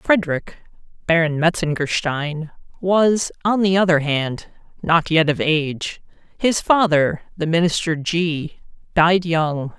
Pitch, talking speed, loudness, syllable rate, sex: 165 Hz, 115 wpm, -19 LUFS, 3.9 syllables/s, female